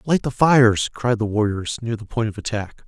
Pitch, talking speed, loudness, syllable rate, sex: 115 Hz, 230 wpm, -20 LUFS, 5.2 syllables/s, male